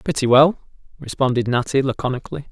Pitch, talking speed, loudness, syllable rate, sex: 130 Hz, 120 wpm, -18 LUFS, 6.3 syllables/s, male